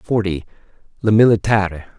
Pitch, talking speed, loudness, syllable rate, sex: 100 Hz, 90 wpm, -17 LUFS, 5.1 syllables/s, male